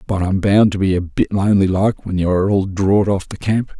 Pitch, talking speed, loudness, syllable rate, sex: 95 Hz, 270 wpm, -17 LUFS, 5.8 syllables/s, male